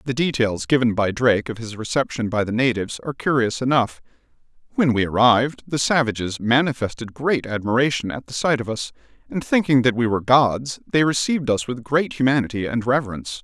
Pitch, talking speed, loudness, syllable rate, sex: 125 Hz, 185 wpm, -21 LUFS, 6.0 syllables/s, male